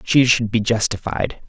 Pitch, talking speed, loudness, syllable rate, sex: 110 Hz, 160 wpm, -18 LUFS, 4.4 syllables/s, male